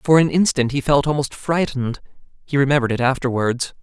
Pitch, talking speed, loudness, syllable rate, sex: 140 Hz, 175 wpm, -19 LUFS, 6.2 syllables/s, male